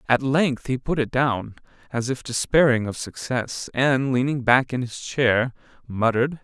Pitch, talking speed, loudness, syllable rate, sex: 125 Hz, 170 wpm, -22 LUFS, 4.4 syllables/s, male